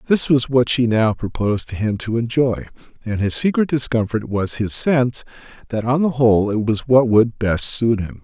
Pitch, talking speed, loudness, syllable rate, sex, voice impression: 120 Hz, 205 wpm, -18 LUFS, 5.0 syllables/s, male, masculine, slightly middle-aged, thick, tensed, slightly hard, clear, calm, mature, slightly wild, kind, slightly strict